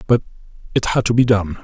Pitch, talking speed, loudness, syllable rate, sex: 110 Hz, 220 wpm, -18 LUFS, 6.4 syllables/s, male